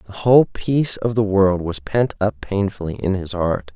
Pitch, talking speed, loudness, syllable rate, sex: 100 Hz, 210 wpm, -19 LUFS, 4.9 syllables/s, male